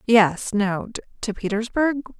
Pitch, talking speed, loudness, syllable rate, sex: 220 Hz, 110 wpm, -22 LUFS, 3.5 syllables/s, female